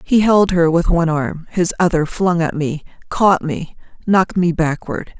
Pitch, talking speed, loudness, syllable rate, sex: 170 Hz, 185 wpm, -17 LUFS, 4.6 syllables/s, female